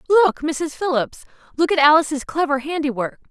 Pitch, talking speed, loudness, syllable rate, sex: 295 Hz, 125 wpm, -19 LUFS, 5.2 syllables/s, female